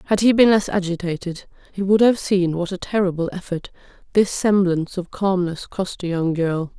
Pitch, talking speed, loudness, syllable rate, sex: 185 Hz, 185 wpm, -20 LUFS, 5.1 syllables/s, female